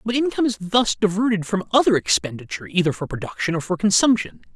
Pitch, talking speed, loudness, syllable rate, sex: 195 Hz, 185 wpm, -20 LUFS, 6.6 syllables/s, male